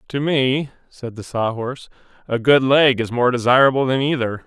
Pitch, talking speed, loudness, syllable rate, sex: 130 Hz, 190 wpm, -18 LUFS, 5.1 syllables/s, male